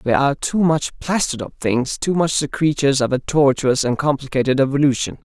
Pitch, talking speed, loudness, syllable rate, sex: 140 Hz, 190 wpm, -18 LUFS, 5.9 syllables/s, male